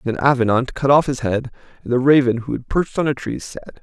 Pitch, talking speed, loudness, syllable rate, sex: 130 Hz, 250 wpm, -18 LUFS, 6.4 syllables/s, male